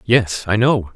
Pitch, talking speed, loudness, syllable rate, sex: 105 Hz, 190 wpm, -17 LUFS, 3.7 syllables/s, male